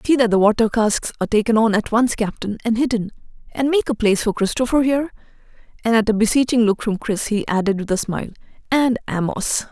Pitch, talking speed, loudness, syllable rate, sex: 225 Hz, 210 wpm, -19 LUFS, 6.2 syllables/s, female